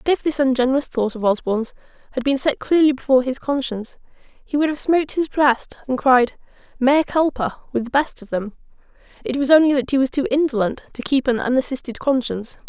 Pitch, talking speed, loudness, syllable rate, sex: 265 Hz, 200 wpm, -20 LUFS, 6.0 syllables/s, female